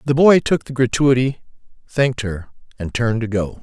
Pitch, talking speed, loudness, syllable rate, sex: 120 Hz, 180 wpm, -18 LUFS, 5.5 syllables/s, male